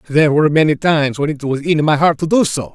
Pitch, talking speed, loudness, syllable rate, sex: 150 Hz, 285 wpm, -15 LUFS, 6.6 syllables/s, male